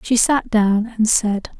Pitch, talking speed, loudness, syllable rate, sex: 220 Hz, 190 wpm, -17 LUFS, 3.6 syllables/s, female